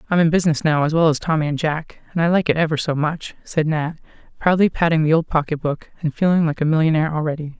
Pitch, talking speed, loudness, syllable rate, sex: 155 Hz, 235 wpm, -19 LUFS, 6.6 syllables/s, female